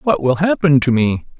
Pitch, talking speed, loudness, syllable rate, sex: 145 Hz, 215 wpm, -15 LUFS, 5.1 syllables/s, male